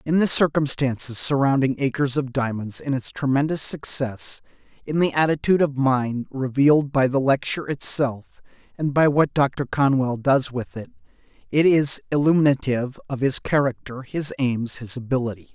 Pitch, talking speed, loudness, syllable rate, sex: 135 Hz, 150 wpm, -21 LUFS, 5.0 syllables/s, male